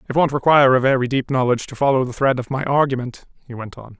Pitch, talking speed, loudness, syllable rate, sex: 130 Hz, 255 wpm, -18 LUFS, 6.9 syllables/s, male